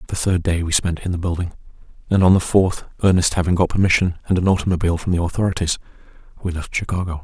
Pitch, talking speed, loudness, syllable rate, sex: 90 Hz, 205 wpm, -19 LUFS, 7.0 syllables/s, male